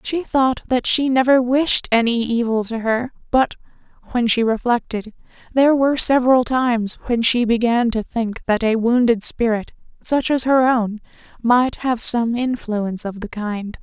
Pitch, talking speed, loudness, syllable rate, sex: 240 Hz, 165 wpm, -18 LUFS, 4.5 syllables/s, female